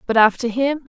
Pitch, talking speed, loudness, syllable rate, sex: 245 Hz, 190 wpm, -18 LUFS, 5.3 syllables/s, female